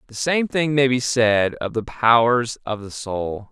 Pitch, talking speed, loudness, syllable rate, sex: 120 Hz, 205 wpm, -20 LUFS, 4.0 syllables/s, male